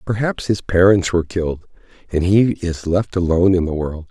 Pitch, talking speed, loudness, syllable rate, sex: 90 Hz, 190 wpm, -18 LUFS, 5.4 syllables/s, male